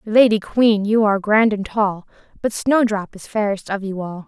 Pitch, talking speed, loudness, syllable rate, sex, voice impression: 210 Hz, 195 wpm, -18 LUFS, 4.7 syllables/s, female, slightly feminine, young, cute, slightly refreshing, slightly friendly